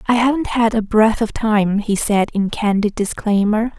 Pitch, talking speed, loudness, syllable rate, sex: 215 Hz, 190 wpm, -17 LUFS, 4.5 syllables/s, female